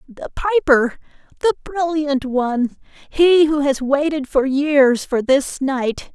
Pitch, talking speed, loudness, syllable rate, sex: 285 Hz, 115 wpm, -18 LUFS, 3.6 syllables/s, female